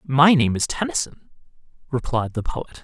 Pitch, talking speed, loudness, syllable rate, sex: 125 Hz, 150 wpm, -21 LUFS, 5.0 syllables/s, male